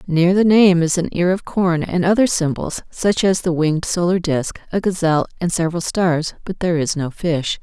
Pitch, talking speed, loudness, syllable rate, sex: 175 Hz, 215 wpm, -18 LUFS, 5.1 syllables/s, female